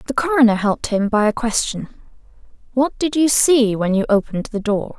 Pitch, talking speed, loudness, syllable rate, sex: 235 Hz, 195 wpm, -17 LUFS, 5.3 syllables/s, female